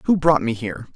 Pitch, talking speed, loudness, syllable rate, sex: 130 Hz, 250 wpm, -20 LUFS, 6.8 syllables/s, male